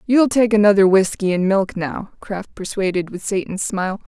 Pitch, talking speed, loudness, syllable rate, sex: 200 Hz, 175 wpm, -18 LUFS, 4.9 syllables/s, female